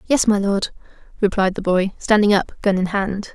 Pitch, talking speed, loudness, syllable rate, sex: 200 Hz, 195 wpm, -19 LUFS, 4.9 syllables/s, female